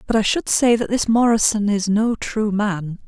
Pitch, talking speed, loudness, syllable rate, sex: 215 Hz, 215 wpm, -18 LUFS, 4.5 syllables/s, female